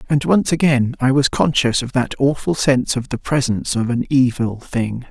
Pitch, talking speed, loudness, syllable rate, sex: 130 Hz, 200 wpm, -18 LUFS, 5.0 syllables/s, male